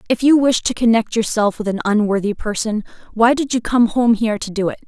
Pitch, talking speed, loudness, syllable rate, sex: 225 Hz, 235 wpm, -17 LUFS, 5.8 syllables/s, female